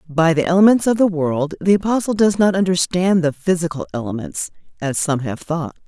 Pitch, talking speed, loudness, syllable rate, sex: 170 Hz, 185 wpm, -18 LUFS, 5.3 syllables/s, female